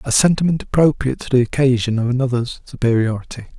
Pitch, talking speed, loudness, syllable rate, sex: 130 Hz, 150 wpm, -18 LUFS, 6.6 syllables/s, male